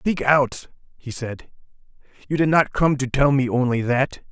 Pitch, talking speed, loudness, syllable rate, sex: 135 Hz, 180 wpm, -20 LUFS, 4.4 syllables/s, male